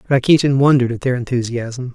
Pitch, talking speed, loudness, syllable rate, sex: 125 Hz, 155 wpm, -16 LUFS, 6.3 syllables/s, male